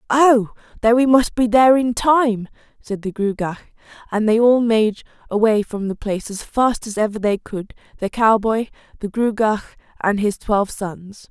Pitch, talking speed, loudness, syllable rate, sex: 220 Hz, 175 wpm, -18 LUFS, 4.7 syllables/s, female